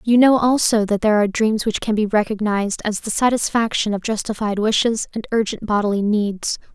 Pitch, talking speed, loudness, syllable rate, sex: 215 Hz, 185 wpm, -19 LUFS, 5.6 syllables/s, female